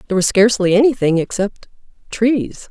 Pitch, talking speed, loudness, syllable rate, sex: 210 Hz, 135 wpm, -16 LUFS, 5.6 syllables/s, female